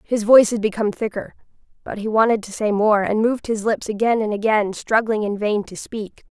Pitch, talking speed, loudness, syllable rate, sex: 215 Hz, 220 wpm, -19 LUFS, 5.6 syllables/s, female